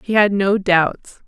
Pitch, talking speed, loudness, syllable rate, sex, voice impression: 195 Hz, 190 wpm, -16 LUFS, 3.5 syllables/s, female, very feminine, adult-like, slightly middle-aged, thin, tensed, powerful, bright, very hard, very clear, slightly halting, slightly raspy, slightly cute, cool, intellectual, refreshing, sincere, slightly calm, slightly friendly, reassuring, very unique, slightly elegant, wild, slightly sweet, lively, strict, slightly intense, very sharp, light